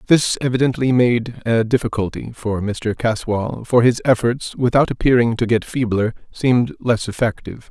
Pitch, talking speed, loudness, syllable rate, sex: 120 Hz, 150 wpm, -18 LUFS, 4.9 syllables/s, male